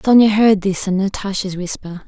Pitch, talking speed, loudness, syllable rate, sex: 195 Hz, 175 wpm, -17 LUFS, 5.1 syllables/s, female